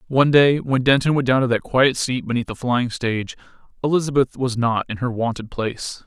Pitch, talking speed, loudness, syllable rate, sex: 125 Hz, 210 wpm, -20 LUFS, 5.6 syllables/s, male